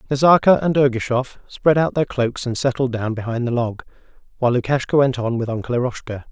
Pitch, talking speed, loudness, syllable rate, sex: 125 Hz, 190 wpm, -19 LUFS, 5.9 syllables/s, male